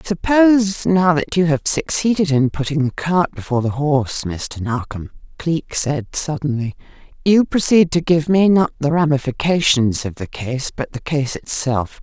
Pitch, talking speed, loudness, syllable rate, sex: 150 Hz, 165 wpm, -18 LUFS, 4.5 syllables/s, female